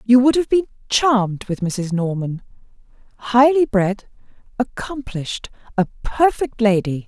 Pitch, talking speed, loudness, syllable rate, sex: 225 Hz, 110 wpm, -19 LUFS, 4.4 syllables/s, female